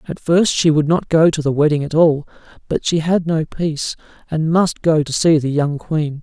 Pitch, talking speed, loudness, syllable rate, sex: 155 Hz, 230 wpm, -17 LUFS, 4.9 syllables/s, male